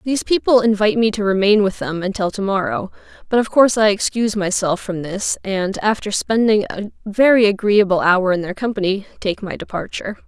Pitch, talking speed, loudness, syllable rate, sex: 205 Hz, 185 wpm, -18 LUFS, 5.7 syllables/s, female